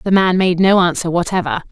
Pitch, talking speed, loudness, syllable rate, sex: 180 Hz, 210 wpm, -15 LUFS, 5.8 syllables/s, female